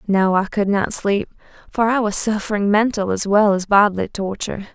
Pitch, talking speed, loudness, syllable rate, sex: 205 Hz, 190 wpm, -18 LUFS, 5.4 syllables/s, female